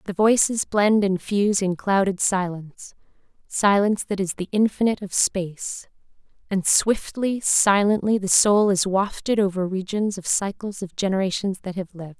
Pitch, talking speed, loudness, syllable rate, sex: 195 Hz, 155 wpm, -21 LUFS, 4.8 syllables/s, female